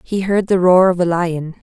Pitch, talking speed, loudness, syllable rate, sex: 180 Hz, 245 wpm, -15 LUFS, 4.7 syllables/s, female